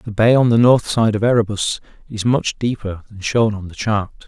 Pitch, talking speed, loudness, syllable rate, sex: 110 Hz, 225 wpm, -17 LUFS, 4.9 syllables/s, male